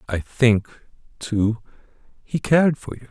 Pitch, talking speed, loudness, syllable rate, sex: 120 Hz, 135 wpm, -21 LUFS, 4.0 syllables/s, male